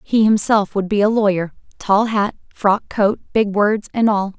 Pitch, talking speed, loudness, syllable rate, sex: 205 Hz, 180 wpm, -17 LUFS, 4.4 syllables/s, female